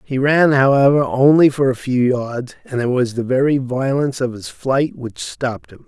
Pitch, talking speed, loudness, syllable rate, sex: 130 Hz, 205 wpm, -17 LUFS, 4.8 syllables/s, male